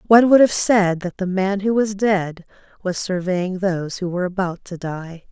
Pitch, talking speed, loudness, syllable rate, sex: 190 Hz, 205 wpm, -19 LUFS, 4.8 syllables/s, female